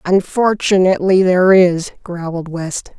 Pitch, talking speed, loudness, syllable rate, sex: 180 Hz, 100 wpm, -14 LUFS, 4.4 syllables/s, female